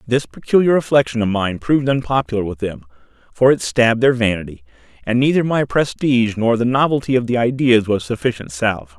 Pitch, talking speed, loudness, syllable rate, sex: 115 Hz, 180 wpm, -17 LUFS, 6.0 syllables/s, male